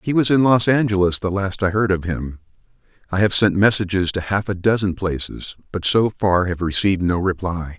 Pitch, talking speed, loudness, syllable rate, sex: 95 Hz, 210 wpm, -19 LUFS, 5.3 syllables/s, male